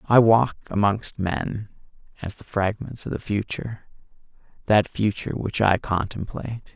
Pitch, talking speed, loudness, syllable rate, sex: 105 Hz, 135 wpm, -24 LUFS, 4.9 syllables/s, male